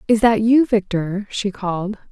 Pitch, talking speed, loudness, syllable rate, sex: 205 Hz, 170 wpm, -18 LUFS, 4.4 syllables/s, female